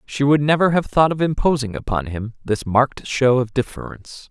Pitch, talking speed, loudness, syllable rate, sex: 135 Hz, 195 wpm, -19 LUFS, 5.4 syllables/s, male